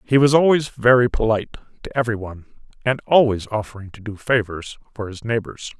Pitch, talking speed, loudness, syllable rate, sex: 115 Hz, 175 wpm, -19 LUFS, 5.8 syllables/s, male